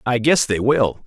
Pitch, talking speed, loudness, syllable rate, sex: 125 Hz, 225 wpm, -17 LUFS, 4.2 syllables/s, male